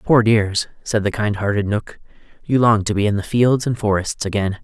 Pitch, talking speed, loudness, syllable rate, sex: 105 Hz, 220 wpm, -18 LUFS, 5.1 syllables/s, male